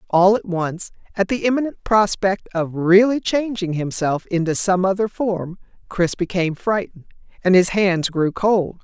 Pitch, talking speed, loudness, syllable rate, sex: 190 Hz, 155 wpm, -19 LUFS, 4.5 syllables/s, female